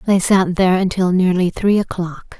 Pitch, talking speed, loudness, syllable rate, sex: 185 Hz, 175 wpm, -16 LUFS, 4.9 syllables/s, female